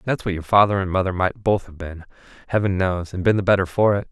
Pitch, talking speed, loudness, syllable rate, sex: 95 Hz, 260 wpm, -20 LUFS, 6.3 syllables/s, male